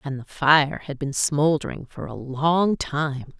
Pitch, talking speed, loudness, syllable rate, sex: 145 Hz, 175 wpm, -22 LUFS, 3.7 syllables/s, female